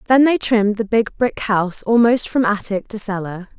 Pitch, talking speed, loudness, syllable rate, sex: 215 Hz, 200 wpm, -18 LUFS, 5.1 syllables/s, female